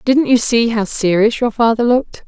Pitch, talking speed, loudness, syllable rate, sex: 230 Hz, 210 wpm, -14 LUFS, 5.1 syllables/s, female